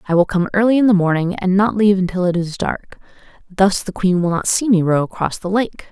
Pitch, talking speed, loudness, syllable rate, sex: 190 Hz, 255 wpm, -17 LUFS, 5.9 syllables/s, female